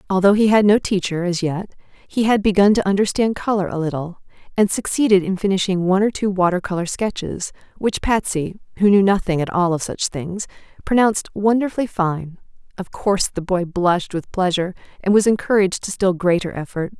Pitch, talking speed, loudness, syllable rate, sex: 190 Hz, 185 wpm, -19 LUFS, 5.7 syllables/s, female